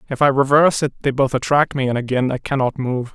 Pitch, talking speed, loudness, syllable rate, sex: 135 Hz, 250 wpm, -18 LUFS, 6.2 syllables/s, male